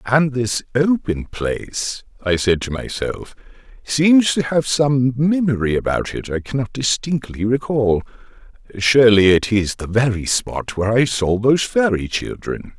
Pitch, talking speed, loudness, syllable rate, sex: 120 Hz, 140 wpm, -18 LUFS, 4.3 syllables/s, male